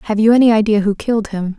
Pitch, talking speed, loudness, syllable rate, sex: 215 Hz, 265 wpm, -14 LUFS, 7.1 syllables/s, female